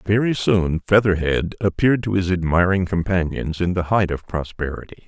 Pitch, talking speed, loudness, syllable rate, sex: 90 Hz, 155 wpm, -20 LUFS, 5.2 syllables/s, male